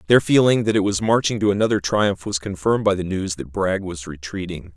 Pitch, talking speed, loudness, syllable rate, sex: 95 Hz, 225 wpm, -20 LUFS, 5.7 syllables/s, male